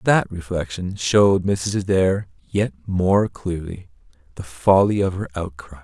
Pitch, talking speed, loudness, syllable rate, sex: 95 Hz, 135 wpm, -21 LUFS, 4.0 syllables/s, male